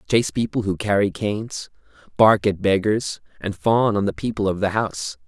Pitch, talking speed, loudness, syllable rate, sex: 100 Hz, 180 wpm, -21 LUFS, 5.2 syllables/s, male